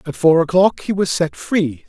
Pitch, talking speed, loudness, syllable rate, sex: 165 Hz, 225 wpm, -17 LUFS, 4.6 syllables/s, male